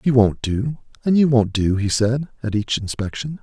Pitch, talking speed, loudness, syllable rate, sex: 120 Hz, 210 wpm, -20 LUFS, 4.8 syllables/s, male